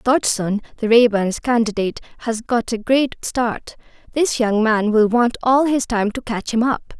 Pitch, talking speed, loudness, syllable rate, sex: 235 Hz, 180 wpm, -18 LUFS, 4.4 syllables/s, female